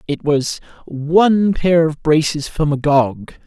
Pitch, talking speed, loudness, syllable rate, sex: 155 Hz, 140 wpm, -16 LUFS, 3.6 syllables/s, male